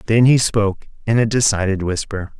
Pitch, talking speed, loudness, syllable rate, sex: 105 Hz, 175 wpm, -17 LUFS, 5.4 syllables/s, male